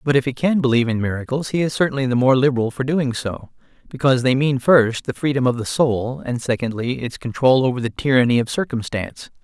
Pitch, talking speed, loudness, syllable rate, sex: 130 Hz, 215 wpm, -19 LUFS, 6.1 syllables/s, male